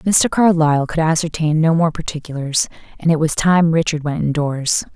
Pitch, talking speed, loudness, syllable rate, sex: 160 Hz, 170 wpm, -17 LUFS, 5.1 syllables/s, female